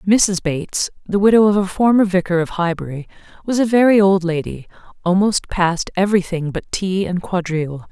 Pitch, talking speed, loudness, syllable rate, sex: 185 Hz, 175 wpm, -17 LUFS, 5.3 syllables/s, female